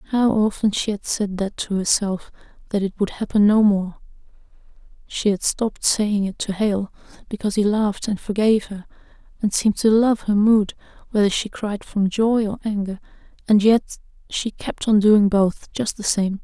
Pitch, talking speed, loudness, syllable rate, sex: 205 Hz, 170 wpm, -20 LUFS, 4.8 syllables/s, female